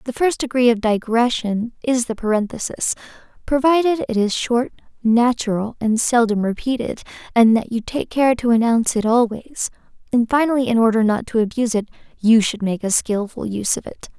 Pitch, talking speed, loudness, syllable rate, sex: 235 Hz, 175 wpm, -19 LUFS, 5.3 syllables/s, female